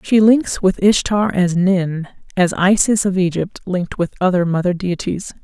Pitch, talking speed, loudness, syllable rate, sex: 190 Hz, 165 wpm, -17 LUFS, 4.6 syllables/s, female